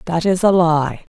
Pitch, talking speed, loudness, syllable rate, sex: 170 Hz, 210 wpm, -16 LUFS, 4.3 syllables/s, female